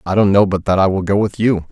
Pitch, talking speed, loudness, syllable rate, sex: 100 Hz, 350 wpm, -15 LUFS, 6.3 syllables/s, male